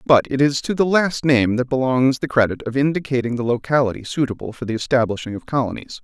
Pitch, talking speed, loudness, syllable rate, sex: 130 Hz, 210 wpm, -19 LUFS, 6.3 syllables/s, male